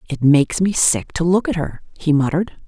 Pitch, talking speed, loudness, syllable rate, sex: 165 Hz, 225 wpm, -17 LUFS, 5.8 syllables/s, female